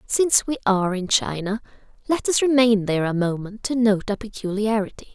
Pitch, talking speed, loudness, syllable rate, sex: 215 Hz, 175 wpm, -21 LUFS, 5.6 syllables/s, female